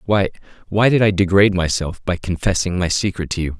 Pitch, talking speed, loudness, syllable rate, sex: 95 Hz, 200 wpm, -18 LUFS, 5.9 syllables/s, male